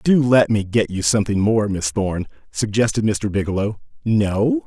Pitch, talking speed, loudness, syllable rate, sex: 110 Hz, 165 wpm, -19 LUFS, 4.6 syllables/s, male